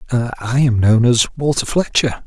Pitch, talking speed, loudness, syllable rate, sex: 125 Hz, 160 wpm, -16 LUFS, 3.9 syllables/s, male